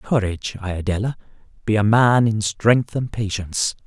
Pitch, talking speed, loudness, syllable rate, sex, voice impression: 105 Hz, 140 wpm, -20 LUFS, 5.0 syllables/s, male, masculine, adult-like, slightly relaxed, powerful, soft, raspy, intellectual, friendly, reassuring, wild, slightly kind, slightly modest